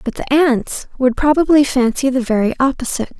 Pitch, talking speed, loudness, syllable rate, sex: 260 Hz, 170 wpm, -15 LUFS, 5.4 syllables/s, female